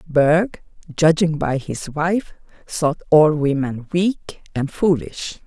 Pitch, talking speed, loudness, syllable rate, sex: 155 Hz, 120 wpm, -19 LUFS, 3.2 syllables/s, female